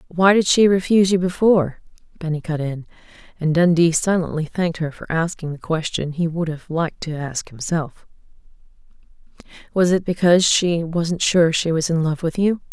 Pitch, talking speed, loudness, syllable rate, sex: 170 Hz, 175 wpm, -19 LUFS, 5.3 syllables/s, female